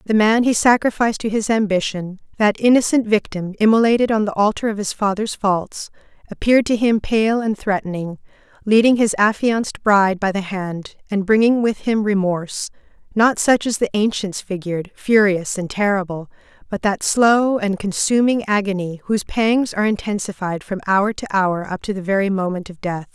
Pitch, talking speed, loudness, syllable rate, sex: 205 Hz, 170 wpm, -18 LUFS, 5.2 syllables/s, female